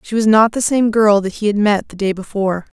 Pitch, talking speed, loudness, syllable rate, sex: 210 Hz, 280 wpm, -15 LUFS, 5.8 syllables/s, female